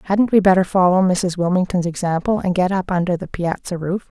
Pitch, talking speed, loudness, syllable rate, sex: 180 Hz, 200 wpm, -18 LUFS, 5.6 syllables/s, female